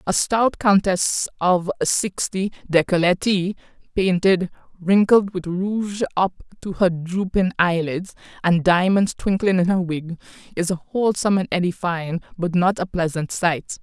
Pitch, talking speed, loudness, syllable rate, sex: 185 Hz, 135 wpm, -20 LUFS, 4.4 syllables/s, female